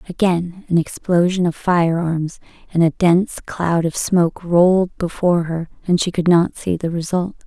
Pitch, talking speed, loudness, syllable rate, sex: 175 Hz, 170 wpm, -18 LUFS, 4.8 syllables/s, female